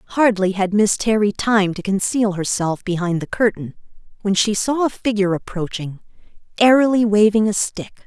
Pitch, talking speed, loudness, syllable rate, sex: 205 Hz, 155 wpm, -18 LUFS, 5.1 syllables/s, female